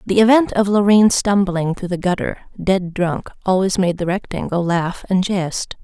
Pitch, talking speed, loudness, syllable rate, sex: 190 Hz, 175 wpm, -18 LUFS, 4.6 syllables/s, female